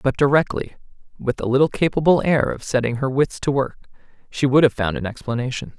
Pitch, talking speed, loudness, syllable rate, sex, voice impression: 135 Hz, 195 wpm, -20 LUFS, 5.9 syllables/s, male, masculine, adult-like, tensed, powerful, bright, clear, cool, intellectual, slightly mature, friendly, wild, lively, slightly kind